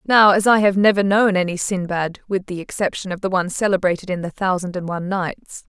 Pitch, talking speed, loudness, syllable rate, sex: 190 Hz, 220 wpm, -19 LUFS, 5.8 syllables/s, female